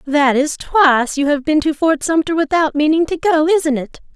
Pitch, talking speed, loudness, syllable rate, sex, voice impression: 300 Hz, 215 wpm, -15 LUFS, 4.9 syllables/s, female, feminine, adult-like, tensed, slightly powerful, bright, soft, clear, slightly muffled, calm, friendly, reassuring, elegant, kind